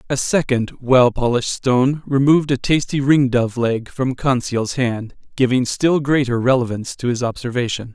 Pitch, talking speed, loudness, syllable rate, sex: 130 Hz, 150 wpm, -18 LUFS, 5.0 syllables/s, male